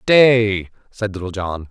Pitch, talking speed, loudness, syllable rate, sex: 105 Hz, 140 wpm, -18 LUFS, 3.5 syllables/s, male